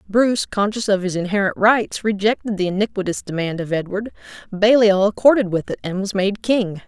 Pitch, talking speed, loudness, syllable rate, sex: 200 Hz, 175 wpm, -19 LUFS, 5.4 syllables/s, female